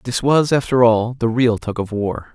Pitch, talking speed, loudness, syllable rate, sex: 120 Hz, 230 wpm, -17 LUFS, 4.7 syllables/s, male